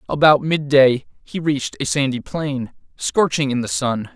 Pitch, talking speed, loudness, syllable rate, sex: 140 Hz, 175 wpm, -19 LUFS, 4.5 syllables/s, male